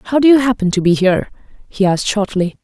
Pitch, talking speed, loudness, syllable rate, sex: 210 Hz, 230 wpm, -14 LUFS, 6.4 syllables/s, female